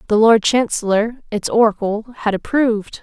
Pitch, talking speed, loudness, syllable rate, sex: 220 Hz, 140 wpm, -17 LUFS, 4.7 syllables/s, female